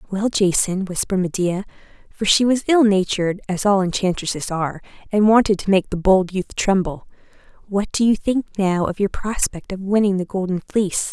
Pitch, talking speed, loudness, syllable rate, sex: 195 Hz, 185 wpm, -19 LUFS, 3.4 syllables/s, female